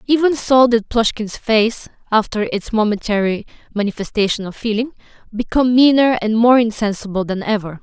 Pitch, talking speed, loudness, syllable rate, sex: 225 Hz, 140 wpm, -17 LUFS, 5.3 syllables/s, female